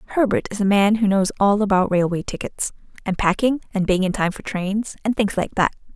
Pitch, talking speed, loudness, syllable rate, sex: 200 Hz, 220 wpm, -20 LUFS, 5.7 syllables/s, female